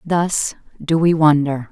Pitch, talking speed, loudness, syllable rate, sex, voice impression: 155 Hz, 140 wpm, -17 LUFS, 3.7 syllables/s, female, feminine, adult-like, slightly sincere, slightly calm, slightly elegant, kind